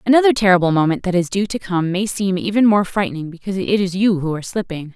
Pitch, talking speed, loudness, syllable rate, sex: 190 Hz, 240 wpm, -18 LUFS, 6.6 syllables/s, female